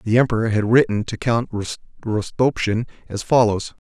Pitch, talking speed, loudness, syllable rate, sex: 110 Hz, 140 wpm, -20 LUFS, 6.1 syllables/s, male